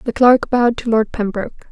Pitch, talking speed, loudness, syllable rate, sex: 230 Hz, 210 wpm, -16 LUFS, 6.0 syllables/s, female